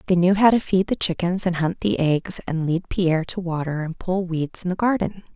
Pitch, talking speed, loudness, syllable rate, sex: 180 Hz, 245 wpm, -22 LUFS, 5.0 syllables/s, female